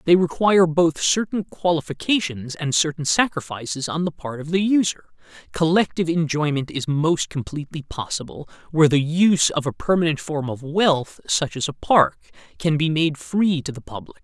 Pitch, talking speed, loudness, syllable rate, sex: 155 Hz, 170 wpm, -21 LUFS, 5.2 syllables/s, male